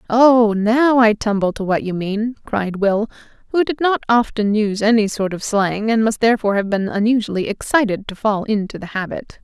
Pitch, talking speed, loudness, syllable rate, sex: 215 Hz, 195 wpm, -18 LUFS, 5.2 syllables/s, female